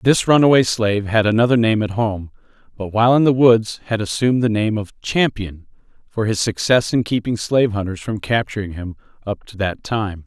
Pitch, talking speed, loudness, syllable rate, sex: 110 Hz, 195 wpm, -18 LUFS, 5.3 syllables/s, male